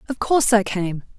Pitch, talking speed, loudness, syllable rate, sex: 215 Hz, 205 wpm, -20 LUFS, 5.4 syllables/s, female